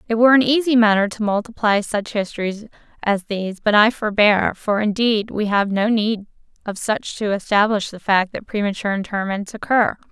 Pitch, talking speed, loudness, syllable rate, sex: 210 Hz, 165 wpm, -19 LUFS, 5.3 syllables/s, female